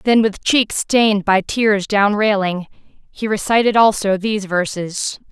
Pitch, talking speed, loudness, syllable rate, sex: 205 Hz, 145 wpm, -16 LUFS, 4.2 syllables/s, female